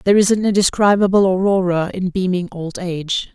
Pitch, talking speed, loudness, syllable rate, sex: 185 Hz, 160 wpm, -17 LUFS, 5.8 syllables/s, female